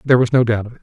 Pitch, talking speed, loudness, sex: 120 Hz, 440 wpm, -16 LUFS, male